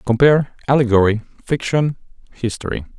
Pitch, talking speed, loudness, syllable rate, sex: 125 Hz, 80 wpm, -18 LUFS, 5.9 syllables/s, male